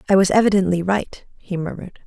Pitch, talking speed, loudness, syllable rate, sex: 190 Hz, 175 wpm, -19 LUFS, 6.4 syllables/s, female